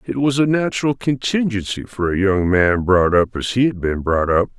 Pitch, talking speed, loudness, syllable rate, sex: 105 Hz, 220 wpm, -18 LUFS, 5.0 syllables/s, male